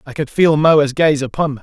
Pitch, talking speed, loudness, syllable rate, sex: 145 Hz, 260 wpm, -14 LUFS, 5.3 syllables/s, male